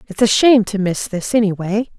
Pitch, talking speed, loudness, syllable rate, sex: 205 Hz, 210 wpm, -16 LUFS, 5.7 syllables/s, female